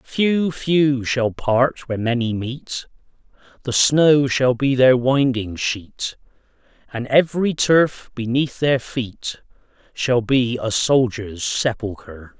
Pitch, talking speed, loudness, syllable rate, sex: 125 Hz, 120 wpm, -19 LUFS, 3.4 syllables/s, male